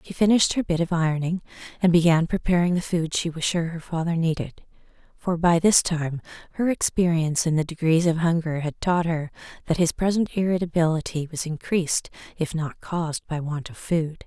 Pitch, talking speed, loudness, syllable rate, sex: 165 Hz, 185 wpm, -23 LUFS, 5.5 syllables/s, female